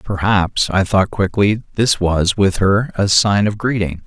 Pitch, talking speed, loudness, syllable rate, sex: 100 Hz, 175 wpm, -16 LUFS, 3.8 syllables/s, male